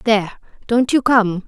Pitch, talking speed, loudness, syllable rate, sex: 225 Hz, 120 wpm, -16 LUFS, 4.6 syllables/s, female